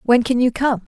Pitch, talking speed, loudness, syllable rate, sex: 245 Hz, 255 wpm, -18 LUFS, 5.3 syllables/s, female